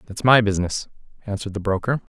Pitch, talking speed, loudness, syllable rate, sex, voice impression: 105 Hz, 170 wpm, -21 LUFS, 7.3 syllables/s, male, very masculine, middle-aged, thick, tensed, slightly powerful, bright, slightly soft, clear, fluent, slightly raspy, cool, very intellectual, very refreshing, sincere, calm, very friendly, very reassuring, unique, elegant, slightly wild, sweet, lively, kind